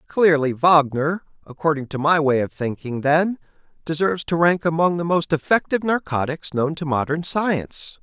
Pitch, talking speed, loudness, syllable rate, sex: 160 Hz, 155 wpm, -20 LUFS, 5.0 syllables/s, male